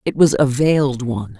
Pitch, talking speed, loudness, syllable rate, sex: 135 Hz, 215 wpm, -17 LUFS, 5.6 syllables/s, female